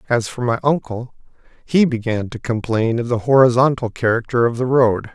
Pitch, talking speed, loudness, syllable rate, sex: 120 Hz, 175 wpm, -18 LUFS, 5.2 syllables/s, male